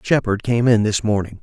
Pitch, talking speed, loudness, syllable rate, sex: 105 Hz, 210 wpm, -18 LUFS, 5.3 syllables/s, male